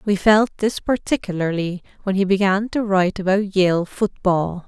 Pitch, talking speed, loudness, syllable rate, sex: 195 Hz, 155 wpm, -20 LUFS, 4.7 syllables/s, female